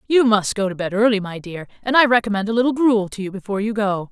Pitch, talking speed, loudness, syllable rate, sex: 210 Hz, 260 wpm, -19 LUFS, 6.7 syllables/s, female